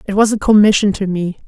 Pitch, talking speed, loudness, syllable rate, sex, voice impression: 200 Hz, 245 wpm, -14 LUFS, 6.2 syllables/s, female, very feminine, middle-aged, thin, slightly tensed, slightly weak, slightly dark, hard, clear, fluent, slightly raspy, slightly cool, intellectual, refreshing, slightly sincere, calm, friendly, slightly reassuring, unique, elegant, slightly wild, slightly sweet, lively, slightly kind, slightly intense, sharp, slightly modest